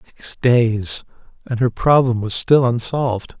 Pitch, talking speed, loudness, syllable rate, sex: 120 Hz, 140 wpm, -18 LUFS, 3.9 syllables/s, male